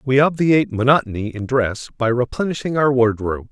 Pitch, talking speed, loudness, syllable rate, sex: 130 Hz, 155 wpm, -18 LUFS, 5.7 syllables/s, male